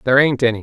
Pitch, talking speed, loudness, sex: 125 Hz, 290 wpm, -15 LUFS, male